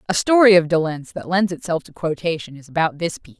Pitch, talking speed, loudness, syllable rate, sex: 170 Hz, 245 wpm, -19 LUFS, 6.3 syllables/s, female